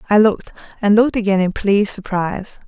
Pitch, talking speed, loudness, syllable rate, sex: 205 Hz, 180 wpm, -16 LUFS, 6.5 syllables/s, female